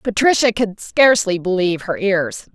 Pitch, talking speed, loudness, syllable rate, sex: 200 Hz, 140 wpm, -17 LUFS, 4.8 syllables/s, female